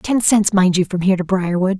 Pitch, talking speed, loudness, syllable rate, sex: 190 Hz, 270 wpm, -16 LUFS, 5.7 syllables/s, female